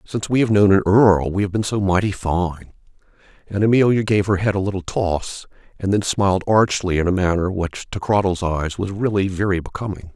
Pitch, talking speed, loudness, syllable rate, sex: 95 Hz, 205 wpm, -19 LUFS, 5.4 syllables/s, male